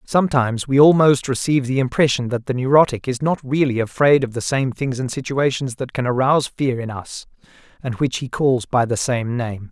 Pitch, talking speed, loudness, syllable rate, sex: 130 Hz, 205 wpm, -19 LUFS, 5.4 syllables/s, male